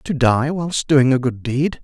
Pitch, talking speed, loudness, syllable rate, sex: 135 Hz, 230 wpm, -18 LUFS, 3.9 syllables/s, male